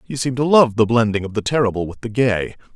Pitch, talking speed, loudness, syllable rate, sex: 115 Hz, 260 wpm, -18 LUFS, 6.4 syllables/s, male